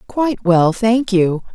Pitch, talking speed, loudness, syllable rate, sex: 205 Hz, 155 wpm, -15 LUFS, 3.9 syllables/s, female